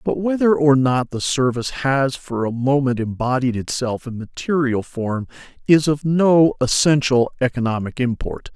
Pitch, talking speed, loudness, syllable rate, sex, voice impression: 135 Hz, 145 wpm, -19 LUFS, 4.6 syllables/s, male, very masculine, very adult-like, slightly old, very thick, tensed, very powerful, bright, hard, very clear, fluent, slightly raspy, cool, intellectual, very sincere, very calm, very mature, very friendly, reassuring, unique, slightly elegant, slightly wild, sweet, lively, kind, slightly modest